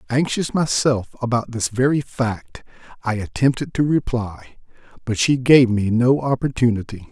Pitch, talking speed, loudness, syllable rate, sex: 125 Hz, 135 wpm, -19 LUFS, 4.5 syllables/s, male